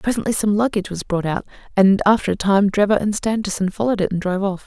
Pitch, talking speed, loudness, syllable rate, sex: 200 Hz, 230 wpm, -19 LUFS, 6.8 syllables/s, female